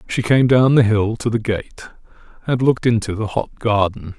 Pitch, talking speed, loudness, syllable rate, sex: 110 Hz, 200 wpm, -17 LUFS, 5.1 syllables/s, male